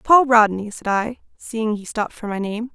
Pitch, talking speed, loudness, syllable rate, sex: 225 Hz, 220 wpm, -20 LUFS, 4.9 syllables/s, female